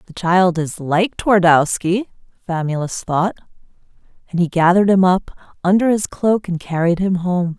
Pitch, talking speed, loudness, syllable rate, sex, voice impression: 180 Hz, 150 wpm, -17 LUFS, 4.7 syllables/s, female, feminine, adult-like, slightly tensed, slightly clear, intellectual, calm, slightly elegant